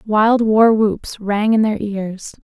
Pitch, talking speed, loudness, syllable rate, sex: 215 Hz, 170 wpm, -16 LUFS, 3.2 syllables/s, female